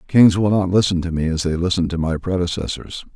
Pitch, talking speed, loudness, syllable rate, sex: 90 Hz, 230 wpm, -19 LUFS, 6.1 syllables/s, male